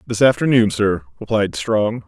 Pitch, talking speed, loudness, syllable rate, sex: 110 Hz, 145 wpm, -18 LUFS, 4.5 syllables/s, male